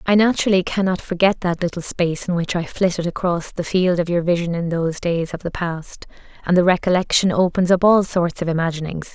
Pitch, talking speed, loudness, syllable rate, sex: 175 Hz, 210 wpm, -19 LUFS, 5.8 syllables/s, female